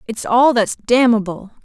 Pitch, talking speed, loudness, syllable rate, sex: 230 Hz, 145 wpm, -15 LUFS, 4.7 syllables/s, female